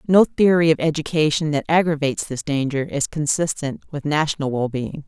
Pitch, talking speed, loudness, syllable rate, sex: 150 Hz, 155 wpm, -20 LUFS, 5.5 syllables/s, female